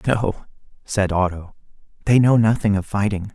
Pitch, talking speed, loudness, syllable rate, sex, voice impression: 105 Hz, 145 wpm, -19 LUFS, 4.7 syllables/s, male, very masculine, very adult-like, very thick, slightly relaxed, very powerful, slightly dark, slightly soft, muffled, fluent, cool, very intellectual, slightly refreshing, slightly sincere, very calm, mature, very friendly, reassuring, unique, very elegant, wild, sweet, slightly lively, kind, slightly modest